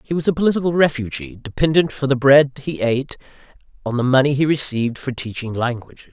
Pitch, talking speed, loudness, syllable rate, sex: 135 Hz, 185 wpm, -18 LUFS, 6.2 syllables/s, male